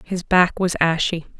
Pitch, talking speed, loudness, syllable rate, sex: 175 Hz, 170 wpm, -19 LUFS, 4.2 syllables/s, female